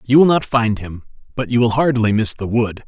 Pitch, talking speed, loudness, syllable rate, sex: 115 Hz, 250 wpm, -17 LUFS, 5.4 syllables/s, male